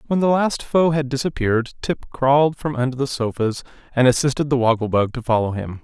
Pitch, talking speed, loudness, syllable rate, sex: 130 Hz, 205 wpm, -20 LUFS, 5.9 syllables/s, male